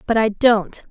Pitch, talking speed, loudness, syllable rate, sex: 220 Hz, 200 wpm, -17 LUFS, 4.3 syllables/s, female